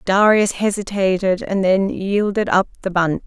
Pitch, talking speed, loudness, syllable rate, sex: 190 Hz, 145 wpm, -18 LUFS, 4.3 syllables/s, female